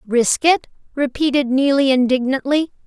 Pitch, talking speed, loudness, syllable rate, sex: 270 Hz, 105 wpm, -17 LUFS, 4.6 syllables/s, female